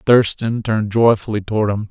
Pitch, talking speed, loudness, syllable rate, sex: 110 Hz, 160 wpm, -17 LUFS, 5.6 syllables/s, male